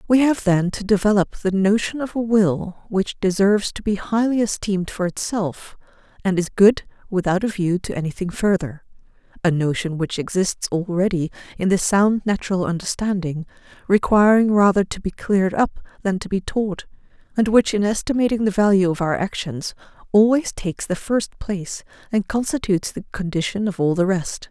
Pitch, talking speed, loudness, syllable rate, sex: 195 Hz, 170 wpm, -20 LUFS, 5.2 syllables/s, female